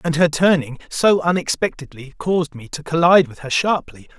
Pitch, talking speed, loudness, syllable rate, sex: 155 Hz, 170 wpm, -18 LUFS, 5.5 syllables/s, male